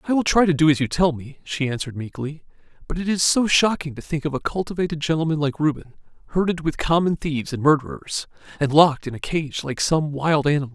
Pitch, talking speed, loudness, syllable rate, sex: 155 Hz, 225 wpm, -21 LUFS, 6.2 syllables/s, male